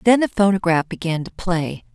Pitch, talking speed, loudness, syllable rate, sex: 180 Hz, 185 wpm, -20 LUFS, 5.1 syllables/s, female